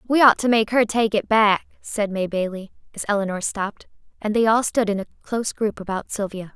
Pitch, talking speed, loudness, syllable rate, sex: 210 Hz, 220 wpm, -21 LUFS, 5.6 syllables/s, female